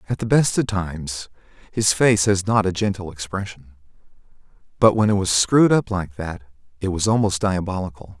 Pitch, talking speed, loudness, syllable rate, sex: 95 Hz, 175 wpm, -20 LUFS, 5.3 syllables/s, male